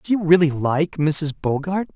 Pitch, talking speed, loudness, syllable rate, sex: 160 Hz, 185 wpm, -19 LUFS, 4.7 syllables/s, male